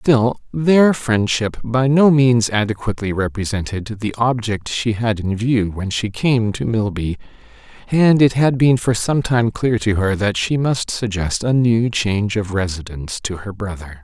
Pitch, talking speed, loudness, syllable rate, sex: 110 Hz, 175 wpm, -18 LUFS, 4.3 syllables/s, male